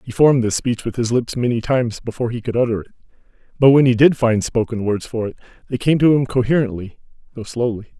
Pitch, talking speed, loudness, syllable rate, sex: 120 Hz, 225 wpm, -18 LUFS, 6.5 syllables/s, male